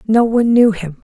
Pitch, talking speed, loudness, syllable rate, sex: 215 Hz, 220 wpm, -13 LUFS, 5.5 syllables/s, female